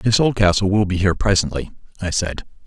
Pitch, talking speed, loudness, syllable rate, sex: 95 Hz, 180 wpm, -19 LUFS, 6.4 syllables/s, male